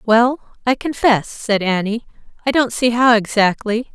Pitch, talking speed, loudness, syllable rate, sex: 230 Hz, 150 wpm, -17 LUFS, 4.4 syllables/s, female